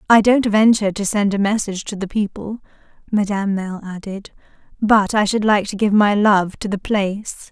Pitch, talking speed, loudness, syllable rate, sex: 205 Hz, 190 wpm, -18 LUFS, 5.4 syllables/s, female